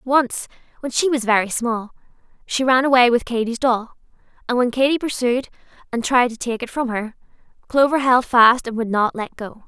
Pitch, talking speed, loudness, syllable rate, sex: 245 Hz, 190 wpm, -19 LUFS, 5.1 syllables/s, female